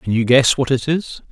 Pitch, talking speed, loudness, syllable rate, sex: 130 Hz, 275 wpm, -16 LUFS, 5.0 syllables/s, male